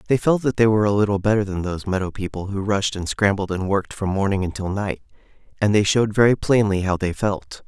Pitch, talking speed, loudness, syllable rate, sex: 100 Hz, 235 wpm, -21 LUFS, 6.3 syllables/s, male